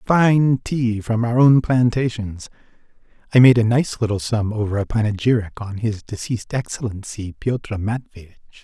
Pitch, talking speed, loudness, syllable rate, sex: 115 Hz, 145 wpm, -19 LUFS, 4.6 syllables/s, male